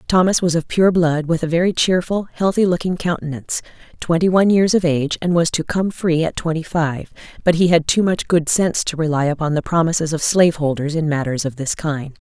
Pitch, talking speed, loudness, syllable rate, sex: 165 Hz, 215 wpm, -18 LUFS, 5.7 syllables/s, female